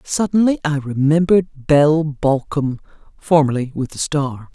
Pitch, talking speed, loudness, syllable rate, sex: 150 Hz, 120 wpm, -17 LUFS, 4.6 syllables/s, female